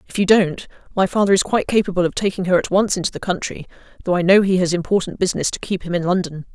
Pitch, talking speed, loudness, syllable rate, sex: 185 Hz, 255 wpm, -18 LUFS, 7.0 syllables/s, female